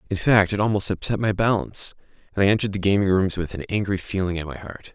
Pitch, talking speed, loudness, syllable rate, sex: 100 Hz, 245 wpm, -22 LUFS, 6.7 syllables/s, male